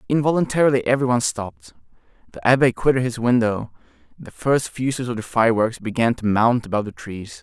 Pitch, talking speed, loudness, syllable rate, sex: 120 Hz, 170 wpm, -20 LUFS, 6.3 syllables/s, male